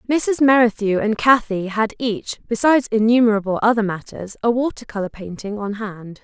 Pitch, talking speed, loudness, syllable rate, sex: 220 Hz, 155 wpm, -19 LUFS, 5.2 syllables/s, female